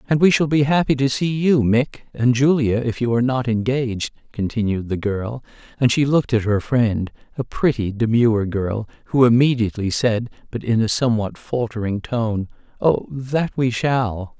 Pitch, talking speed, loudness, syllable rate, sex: 120 Hz, 175 wpm, -20 LUFS, 5.0 syllables/s, male